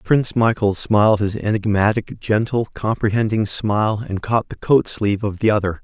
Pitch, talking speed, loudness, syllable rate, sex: 105 Hz, 165 wpm, -19 LUFS, 5.2 syllables/s, male